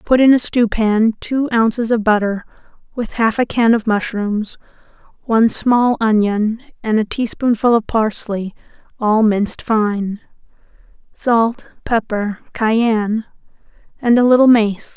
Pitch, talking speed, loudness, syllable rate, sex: 225 Hz, 130 wpm, -16 LUFS, 4.1 syllables/s, female